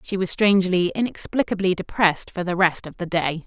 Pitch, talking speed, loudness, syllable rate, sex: 185 Hz, 190 wpm, -22 LUFS, 5.7 syllables/s, female